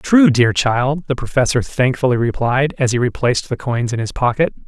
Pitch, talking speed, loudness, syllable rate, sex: 130 Hz, 190 wpm, -17 LUFS, 5.1 syllables/s, male